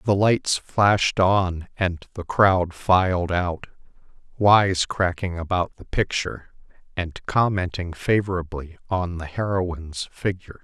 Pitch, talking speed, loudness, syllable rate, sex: 90 Hz, 120 wpm, -22 LUFS, 4.0 syllables/s, male